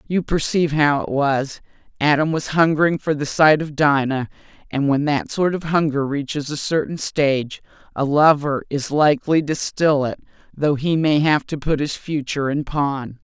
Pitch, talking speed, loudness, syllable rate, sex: 145 Hz, 180 wpm, -19 LUFS, 4.8 syllables/s, female